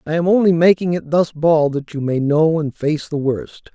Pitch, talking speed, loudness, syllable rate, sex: 160 Hz, 240 wpm, -17 LUFS, 4.8 syllables/s, male